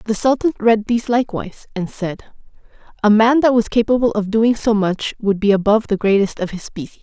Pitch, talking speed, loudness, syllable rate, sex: 215 Hz, 205 wpm, -17 LUFS, 5.9 syllables/s, female